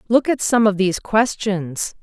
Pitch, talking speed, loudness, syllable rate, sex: 210 Hz, 180 wpm, -18 LUFS, 4.4 syllables/s, female